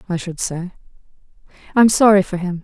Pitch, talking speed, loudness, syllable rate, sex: 190 Hz, 185 wpm, -16 LUFS, 6.3 syllables/s, female